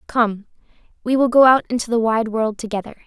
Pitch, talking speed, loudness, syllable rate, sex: 230 Hz, 195 wpm, -18 LUFS, 5.7 syllables/s, female